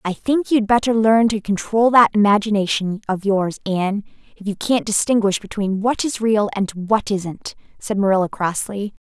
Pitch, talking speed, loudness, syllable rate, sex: 210 Hz, 170 wpm, -19 LUFS, 4.8 syllables/s, female